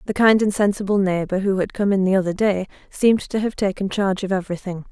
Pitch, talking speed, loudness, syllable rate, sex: 195 Hz, 230 wpm, -20 LUFS, 6.4 syllables/s, female